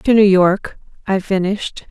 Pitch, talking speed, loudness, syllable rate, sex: 195 Hz, 160 wpm, -16 LUFS, 4.4 syllables/s, female